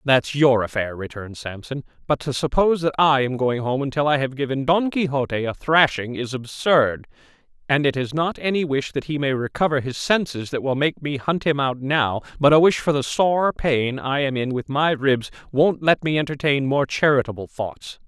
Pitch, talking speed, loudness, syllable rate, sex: 140 Hz, 210 wpm, -21 LUFS, 5.1 syllables/s, male